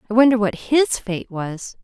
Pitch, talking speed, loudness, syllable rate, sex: 220 Hz, 195 wpm, -19 LUFS, 4.4 syllables/s, female